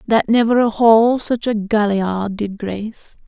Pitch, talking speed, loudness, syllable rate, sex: 220 Hz, 165 wpm, -16 LUFS, 3.9 syllables/s, female